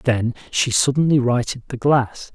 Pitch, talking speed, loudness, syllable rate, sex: 130 Hz, 155 wpm, -19 LUFS, 4.3 syllables/s, male